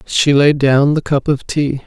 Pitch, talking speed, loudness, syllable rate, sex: 140 Hz, 225 wpm, -14 LUFS, 4.1 syllables/s, female